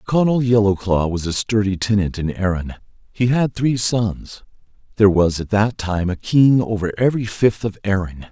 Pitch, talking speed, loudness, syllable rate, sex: 105 Hz, 175 wpm, -18 LUFS, 4.8 syllables/s, male